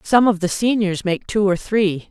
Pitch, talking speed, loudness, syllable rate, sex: 195 Hz, 230 wpm, -19 LUFS, 4.5 syllables/s, female